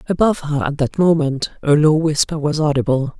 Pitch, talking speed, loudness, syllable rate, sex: 150 Hz, 190 wpm, -17 LUFS, 5.5 syllables/s, female